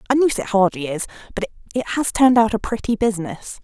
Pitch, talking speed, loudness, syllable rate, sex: 220 Hz, 215 wpm, -20 LUFS, 6.7 syllables/s, female